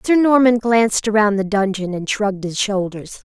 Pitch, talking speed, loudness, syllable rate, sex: 210 Hz, 180 wpm, -17 LUFS, 4.8 syllables/s, female